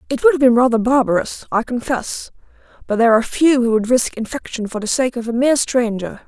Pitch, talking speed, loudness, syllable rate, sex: 240 Hz, 220 wpm, -17 LUFS, 6.1 syllables/s, female